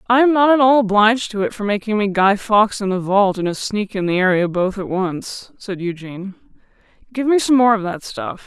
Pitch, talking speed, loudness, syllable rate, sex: 210 Hz, 240 wpm, -17 LUFS, 5.5 syllables/s, female